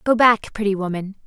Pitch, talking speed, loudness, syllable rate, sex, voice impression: 205 Hz, 190 wpm, -19 LUFS, 6.4 syllables/s, female, feminine, slightly young, tensed, bright, clear, fluent, cute, friendly, slightly reassuring, elegant, lively, kind